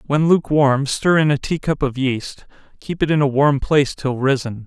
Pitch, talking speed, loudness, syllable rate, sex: 140 Hz, 205 wpm, -18 LUFS, 5.0 syllables/s, male